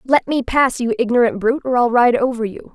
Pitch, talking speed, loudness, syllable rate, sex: 250 Hz, 240 wpm, -17 LUFS, 5.9 syllables/s, female